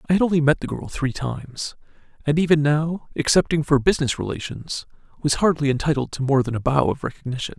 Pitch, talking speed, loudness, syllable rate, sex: 145 Hz, 200 wpm, -22 LUFS, 6.1 syllables/s, male